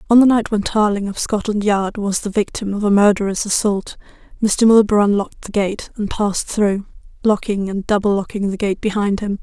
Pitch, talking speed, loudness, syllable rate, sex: 205 Hz, 195 wpm, -18 LUFS, 5.4 syllables/s, female